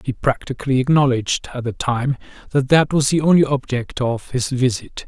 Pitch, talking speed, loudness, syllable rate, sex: 130 Hz, 175 wpm, -19 LUFS, 5.3 syllables/s, male